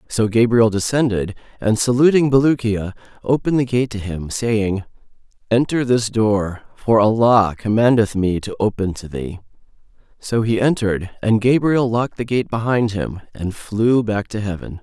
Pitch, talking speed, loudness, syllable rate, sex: 110 Hz, 155 wpm, -18 LUFS, 4.7 syllables/s, male